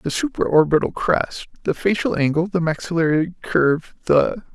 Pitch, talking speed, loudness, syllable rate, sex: 165 Hz, 145 wpm, -20 LUFS, 4.9 syllables/s, male